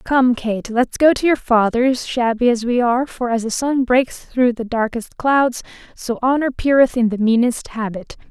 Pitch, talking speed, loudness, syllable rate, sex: 245 Hz, 195 wpm, -17 LUFS, 4.6 syllables/s, female